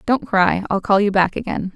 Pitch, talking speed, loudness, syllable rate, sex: 205 Hz, 240 wpm, -18 LUFS, 5.0 syllables/s, female